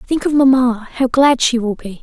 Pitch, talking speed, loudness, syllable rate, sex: 250 Hz, 235 wpm, -14 LUFS, 4.8 syllables/s, female